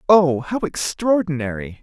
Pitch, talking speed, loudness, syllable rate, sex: 160 Hz, 100 wpm, -20 LUFS, 4.4 syllables/s, male